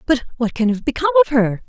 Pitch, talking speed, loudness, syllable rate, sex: 250 Hz, 250 wpm, -17 LUFS, 7.5 syllables/s, female